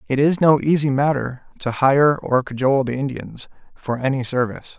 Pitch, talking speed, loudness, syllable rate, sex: 135 Hz, 175 wpm, -19 LUFS, 5.2 syllables/s, male